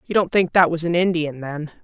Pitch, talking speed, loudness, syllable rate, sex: 170 Hz, 260 wpm, -19 LUFS, 5.5 syllables/s, female